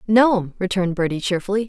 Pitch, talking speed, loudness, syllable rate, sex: 195 Hz, 145 wpm, -20 LUFS, 6.1 syllables/s, female